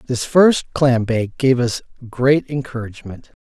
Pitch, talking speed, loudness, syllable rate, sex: 125 Hz, 140 wpm, -17 LUFS, 4.3 syllables/s, male